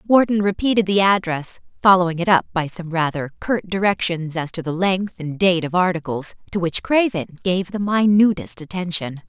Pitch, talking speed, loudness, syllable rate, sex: 180 Hz, 175 wpm, -20 LUFS, 5.1 syllables/s, female